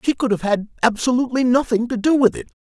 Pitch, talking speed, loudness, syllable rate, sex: 240 Hz, 230 wpm, -19 LUFS, 6.5 syllables/s, male